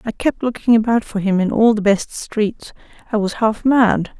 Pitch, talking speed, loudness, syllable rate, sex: 220 Hz, 215 wpm, -17 LUFS, 4.7 syllables/s, female